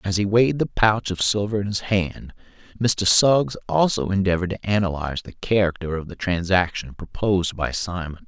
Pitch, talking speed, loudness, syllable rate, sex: 95 Hz, 175 wpm, -21 LUFS, 5.3 syllables/s, male